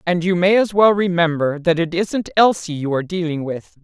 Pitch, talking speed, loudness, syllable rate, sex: 175 Hz, 220 wpm, -18 LUFS, 5.3 syllables/s, female